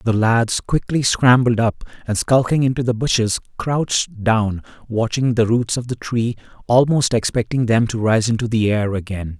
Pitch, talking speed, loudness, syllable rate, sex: 115 Hz, 170 wpm, -18 LUFS, 4.7 syllables/s, male